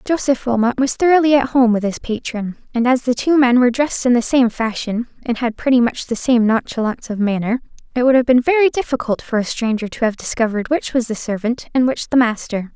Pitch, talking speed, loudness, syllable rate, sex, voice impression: 245 Hz, 230 wpm, -17 LUFS, 6.0 syllables/s, female, feminine, slightly adult-like, cute, friendly, slightly sweet